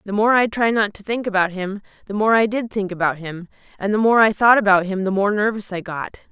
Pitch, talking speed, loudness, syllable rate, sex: 205 Hz, 265 wpm, -19 LUFS, 5.8 syllables/s, female